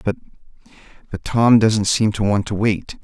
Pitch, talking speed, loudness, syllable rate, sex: 105 Hz, 160 wpm, -17 LUFS, 4.6 syllables/s, male